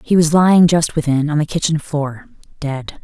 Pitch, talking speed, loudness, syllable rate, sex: 155 Hz, 200 wpm, -16 LUFS, 5.0 syllables/s, female